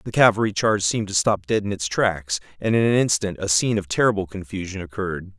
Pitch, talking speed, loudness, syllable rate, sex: 100 Hz, 225 wpm, -22 LUFS, 6.4 syllables/s, male